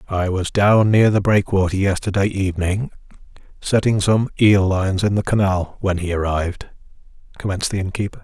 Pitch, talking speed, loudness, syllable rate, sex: 100 Hz, 155 wpm, -18 LUFS, 5.5 syllables/s, male